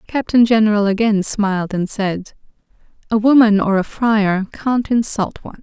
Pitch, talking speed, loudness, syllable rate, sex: 215 Hz, 160 wpm, -16 LUFS, 4.9 syllables/s, female